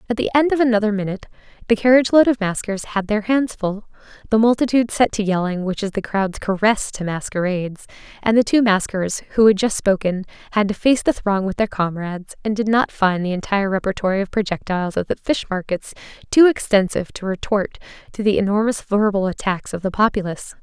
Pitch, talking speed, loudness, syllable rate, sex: 205 Hz, 195 wpm, -19 LUFS, 6.0 syllables/s, female